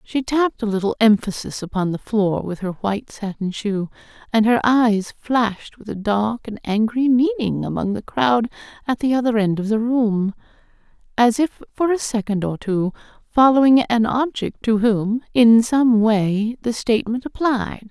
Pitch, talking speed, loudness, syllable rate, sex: 225 Hz, 170 wpm, -19 LUFS, 4.6 syllables/s, female